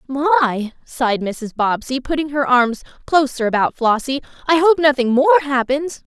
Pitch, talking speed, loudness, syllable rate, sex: 270 Hz, 145 wpm, -17 LUFS, 4.5 syllables/s, female